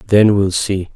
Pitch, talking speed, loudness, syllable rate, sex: 100 Hz, 190 wpm, -15 LUFS, 4.1 syllables/s, male